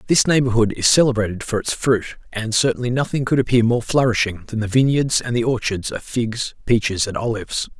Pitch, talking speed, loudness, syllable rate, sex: 120 Hz, 190 wpm, -19 LUFS, 5.8 syllables/s, male